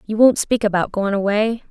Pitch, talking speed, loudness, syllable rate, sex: 210 Hz, 210 wpm, -18 LUFS, 5.1 syllables/s, female